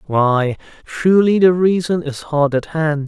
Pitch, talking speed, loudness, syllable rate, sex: 155 Hz, 155 wpm, -16 LUFS, 3.7 syllables/s, male